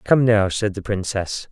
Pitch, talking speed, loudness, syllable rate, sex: 105 Hz, 200 wpm, -20 LUFS, 4.3 syllables/s, male